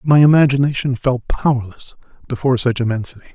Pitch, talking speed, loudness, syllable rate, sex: 130 Hz, 125 wpm, -16 LUFS, 6.5 syllables/s, male